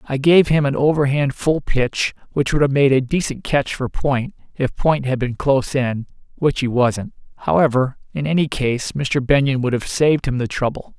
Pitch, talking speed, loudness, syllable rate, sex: 135 Hz, 200 wpm, -19 LUFS, 4.9 syllables/s, male